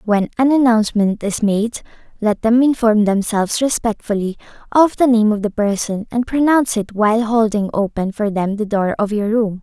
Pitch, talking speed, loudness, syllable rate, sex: 220 Hz, 180 wpm, -17 LUFS, 5.1 syllables/s, female